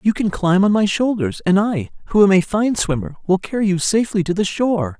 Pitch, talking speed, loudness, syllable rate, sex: 190 Hz, 240 wpm, -18 LUFS, 5.7 syllables/s, male